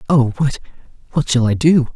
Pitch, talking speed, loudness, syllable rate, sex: 135 Hz, 155 wpm, -16 LUFS, 5.3 syllables/s, male